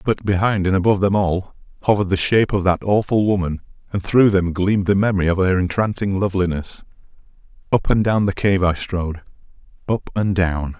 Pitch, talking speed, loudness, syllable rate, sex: 95 Hz, 180 wpm, -19 LUFS, 5.9 syllables/s, male